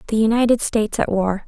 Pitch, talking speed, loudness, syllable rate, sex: 215 Hz, 205 wpm, -19 LUFS, 6.5 syllables/s, female